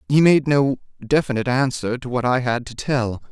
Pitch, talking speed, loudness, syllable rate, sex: 130 Hz, 200 wpm, -20 LUFS, 5.2 syllables/s, male